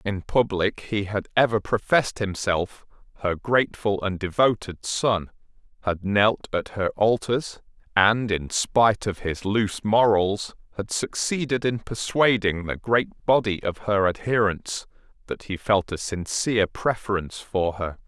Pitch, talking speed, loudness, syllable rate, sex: 105 Hz, 140 wpm, -24 LUFS, 4.2 syllables/s, male